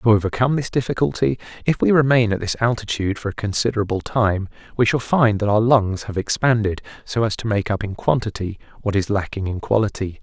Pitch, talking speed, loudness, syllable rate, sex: 110 Hz, 200 wpm, -20 LUFS, 6.0 syllables/s, male